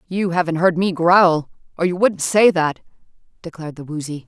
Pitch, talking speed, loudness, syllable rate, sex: 170 Hz, 180 wpm, -17 LUFS, 5.2 syllables/s, female